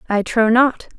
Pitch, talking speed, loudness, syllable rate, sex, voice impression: 230 Hz, 180 wpm, -16 LUFS, 4.2 syllables/s, female, very feminine, young, thin, tensed, powerful, bright, very hard, very clear, very fluent, slightly raspy, cute, very intellectual, very refreshing, sincere, very calm, friendly, very reassuring, very unique, very elegant, slightly wild, sweet, slightly lively, slightly strict, slightly intense, sharp